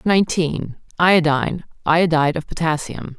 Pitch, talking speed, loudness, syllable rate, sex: 160 Hz, 55 wpm, -19 LUFS, 5.2 syllables/s, female